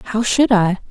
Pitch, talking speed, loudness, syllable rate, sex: 220 Hz, 200 wpm, -15 LUFS, 3.8 syllables/s, female